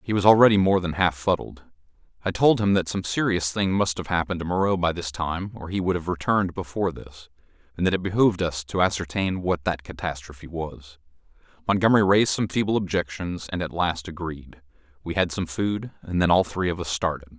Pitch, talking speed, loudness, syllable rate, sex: 90 Hz, 205 wpm, -24 LUFS, 5.8 syllables/s, male